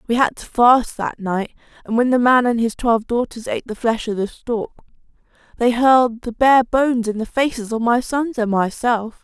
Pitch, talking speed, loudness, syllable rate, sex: 235 Hz, 215 wpm, -18 LUFS, 5.1 syllables/s, female